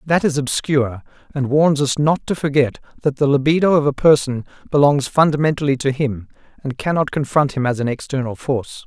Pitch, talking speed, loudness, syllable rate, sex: 140 Hz, 185 wpm, -18 LUFS, 5.6 syllables/s, male